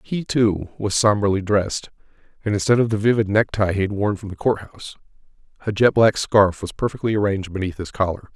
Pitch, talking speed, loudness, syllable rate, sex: 105 Hz, 195 wpm, -20 LUFS, 5.9 syllables/s, male